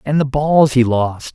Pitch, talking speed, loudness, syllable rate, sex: 135 Hz, 225 wpm, -15 LUFS, 4.0 syllables/s, male